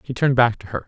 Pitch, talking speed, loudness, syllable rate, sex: 120 Hz, 345 wpm, -19 LUFS, 7.8 syllables/s, male